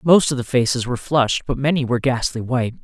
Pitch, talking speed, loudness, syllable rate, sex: 130 Hz, 235 wpm, -19 LUFS, 6.9 syllables/s, male